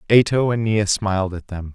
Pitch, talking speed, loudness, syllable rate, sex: 105 Hz, 275 wpm, -19 LUFS, 6.6 syllables/s, male